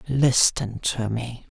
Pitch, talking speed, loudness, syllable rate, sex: 120 Hz, 115 wpm, -22 LUFS, 3.2 syllables/s, male